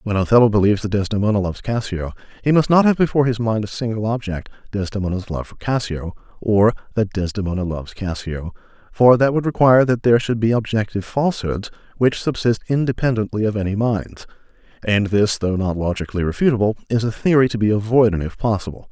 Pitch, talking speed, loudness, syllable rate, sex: 110 Hz, 180 wpm, -19 LUFS, 6.3 syllables/s, male